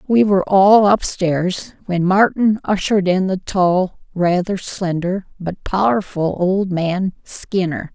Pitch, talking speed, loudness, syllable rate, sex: 190 Hz, 130 wpm, -17 LUFS, 3.7 syllables/s, female